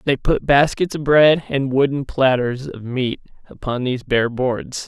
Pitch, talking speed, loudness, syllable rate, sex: 130 Hz, 170 wpm, -18 LUFS, 4.3 syllables/s, male